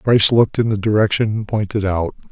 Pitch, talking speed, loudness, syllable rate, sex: 105 Hz, 180 wpm, -17 LUFS, 5.6 syllables/s, male